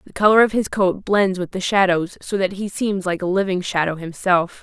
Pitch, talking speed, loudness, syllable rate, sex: 190 Hz, 235 wpm, -19 LUFS, 5.1 syllables/s, female